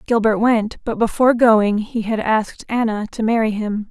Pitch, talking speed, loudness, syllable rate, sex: 220 Hz, 185 wpm, -18 LUFS, 5.0 syllables/s, female